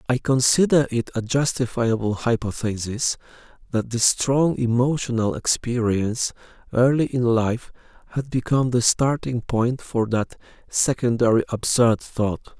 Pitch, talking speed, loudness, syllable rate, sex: 120 Hz, 115 wpm, -22 LUFS, 4.5 syllables/s, male